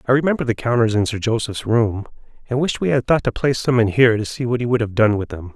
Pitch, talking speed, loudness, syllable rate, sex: 115 Hz, 290 wpm, -19 LUFS, 6.8 syllables/s, male